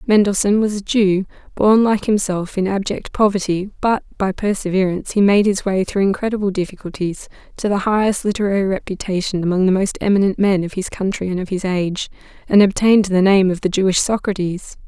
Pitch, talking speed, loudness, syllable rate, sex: 195 Hz, 180 wpm, -18 LUFS, 5.7 syllables/s, female